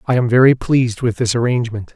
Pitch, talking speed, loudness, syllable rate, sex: 120 Hz, 215 wpm, -16 LUFS, 6.6 syllables/s, male